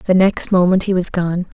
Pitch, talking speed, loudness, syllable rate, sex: 185 Hz, 225 wpm, -16 LUFS, 4.8 syllables/s, female